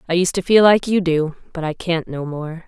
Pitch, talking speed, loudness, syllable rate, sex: 170 Hz, 270 wpm, -18 LUFS, 5.2 syllables/s, female